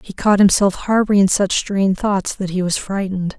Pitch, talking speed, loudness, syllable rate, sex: 195 Hz, 195 wpm, -17 LUFS, 5.2 syllables/s, female